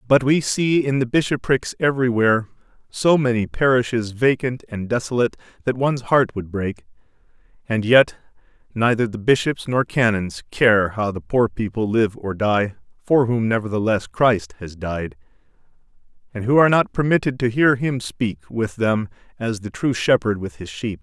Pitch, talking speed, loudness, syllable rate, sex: 115 Hz, 165 wpm, -20 LUFS, 4.8 syllables/s, male